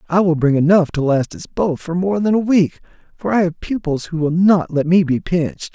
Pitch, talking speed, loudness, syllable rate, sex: 170 Hz, 250 wpm, -17 LUFS, 5.2 syllables/s, male